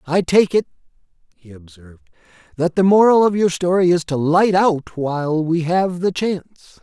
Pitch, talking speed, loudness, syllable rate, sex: 170 Hz, 175 wpm, -17 LUFS, 5.1 syllables/s, male